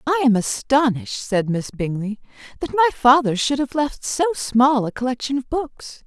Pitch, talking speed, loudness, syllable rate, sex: 255 Hz, 180 wpm, -20 LUFS, 4.8 syllables/s, female